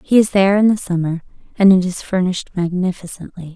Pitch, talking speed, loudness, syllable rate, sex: 185 Hz, 170 wpm, -16 LUFS, 5.8 syllables/s, female